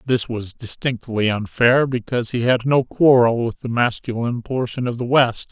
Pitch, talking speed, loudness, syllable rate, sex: 120 Hz, 175 wpm, -19 LUFS, 4.8 syllables/s, male